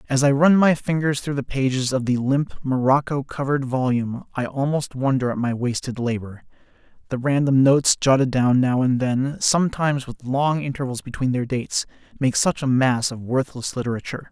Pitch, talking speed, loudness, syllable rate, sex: 135 Hz, 175 wpm, -21 LUFS, 5.4 syllables/s, male